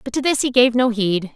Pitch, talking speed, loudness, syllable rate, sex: 240 Hz, 310 wpm, -17 LUFS, 5.6 syllables/s, female